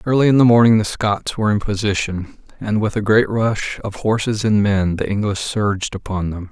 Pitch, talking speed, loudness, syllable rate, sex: 105 Hz, 210 wpm, -18 LUFS, 5.3 syllables/s, male